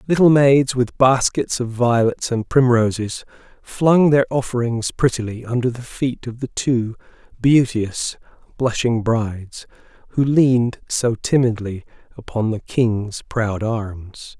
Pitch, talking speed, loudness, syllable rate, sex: 120 Hz, 125 wpm, -19 LUFS, 3.9 syllables/s, male